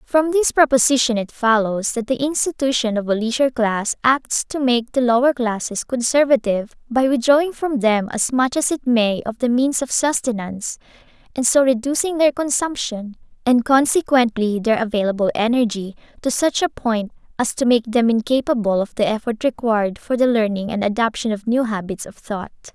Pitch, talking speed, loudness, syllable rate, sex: 240 Hz, 175 wpm, -19 LUFS, 5.2 syllables/s, female